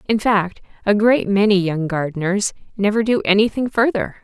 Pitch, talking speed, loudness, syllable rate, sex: 205 Hz, 155 wpm, -18 LUFS, 5.0 syllables/s, female